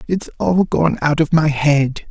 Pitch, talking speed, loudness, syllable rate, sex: 155 Hz, 200 wpm, -16 LUFS, 3.9 syllables/s, male